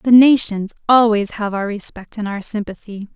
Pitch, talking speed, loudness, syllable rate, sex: 210 Hz, 170 wpm, -17 LUFS, 4.8 syllables/s, female